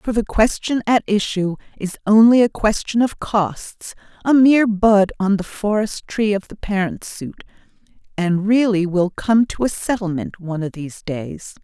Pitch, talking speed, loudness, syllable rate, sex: 205 Hz, 170 wpm, -18 LUFS, 4.6 syllables/s, female